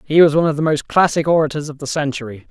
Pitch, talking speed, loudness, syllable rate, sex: 150 Hz, 265 wpm, -17 LUFS, 7.1 syllables/s, male